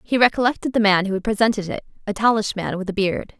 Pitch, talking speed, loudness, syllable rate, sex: 210 Hz, 250 wpm, -20 LUFS, 6.5 syllables/s, female